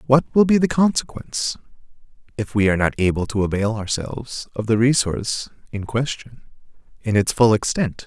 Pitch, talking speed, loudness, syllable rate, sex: 115 Hz, 165 wpm, -20 LUFS, 5.5 syllables/s, male